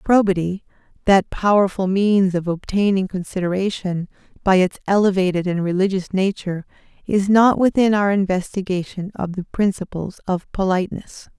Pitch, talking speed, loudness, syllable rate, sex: 190 Hz, 120 wpm, -19 LUFS, 5.1 syllables/s, female